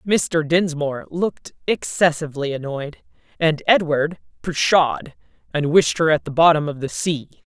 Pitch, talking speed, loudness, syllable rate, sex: 160 Hz, 135 wpm, -20 LUFS, 4.6 syllables/s, female